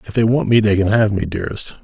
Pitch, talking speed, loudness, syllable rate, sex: 105 Hz, 295 wpm, -16 LUFS, 6.8 syllables/s, male